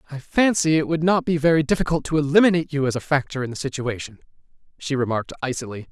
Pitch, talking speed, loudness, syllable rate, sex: 145 Hz, 205 wpm, -21 LUFS, 7.0 syllables/s, male